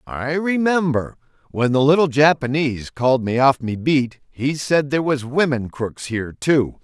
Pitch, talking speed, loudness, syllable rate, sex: 140 Hz, 160 wpm, -19 LUFS, 4.6 syllables/s, male